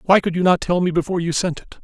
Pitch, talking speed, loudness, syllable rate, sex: 175 Hz, 325 wpm, -19 LUFS, 7.0 syllables/s, male